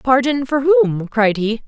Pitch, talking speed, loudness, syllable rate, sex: 245 Hz, 180 wpm, -16 LUFS, 3.9 syllables/s, female